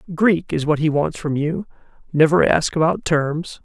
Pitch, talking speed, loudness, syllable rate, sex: 160 Hz, 165 wpm, -19 LUFS, 4.5 syllables/s, male